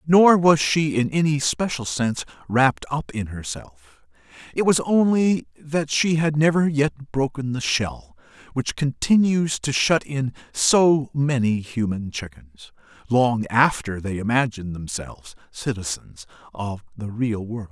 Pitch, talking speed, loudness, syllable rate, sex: 130 Hz, 140 wpm, -22 LUFS, 4.0 syllables/s, male